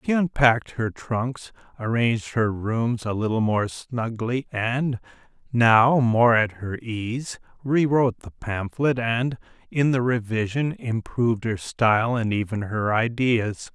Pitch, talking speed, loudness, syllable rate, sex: 120 Hz, 135 wpm, -23 LUFS, 3.8 syllables/s, male